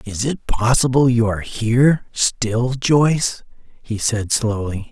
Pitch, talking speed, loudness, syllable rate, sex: 115 Hz, 135 wpm, -18 LUFS, 3.8 syllables/s, male